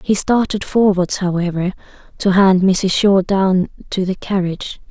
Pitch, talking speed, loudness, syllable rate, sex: 190 Hz, 145 wpm, -16 LUFS, 4.4 syllables/s, female